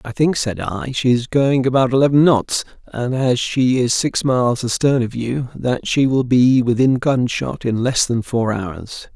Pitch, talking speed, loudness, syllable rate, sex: 125 Hz, 195 wpm, -17 LUFS, 4.2 syllables/s, male